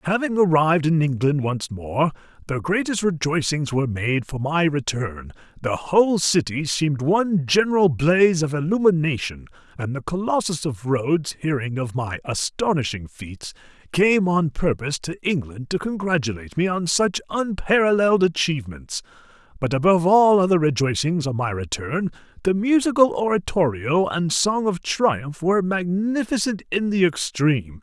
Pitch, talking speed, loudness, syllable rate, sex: 160 Hz, 140 wpm, -21 LUFS, 4.9 syllables/s, male